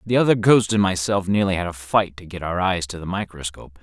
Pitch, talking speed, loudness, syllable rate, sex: 95 Hz, 250 wpm, -21 LUFS, 5.9 syllables/s, male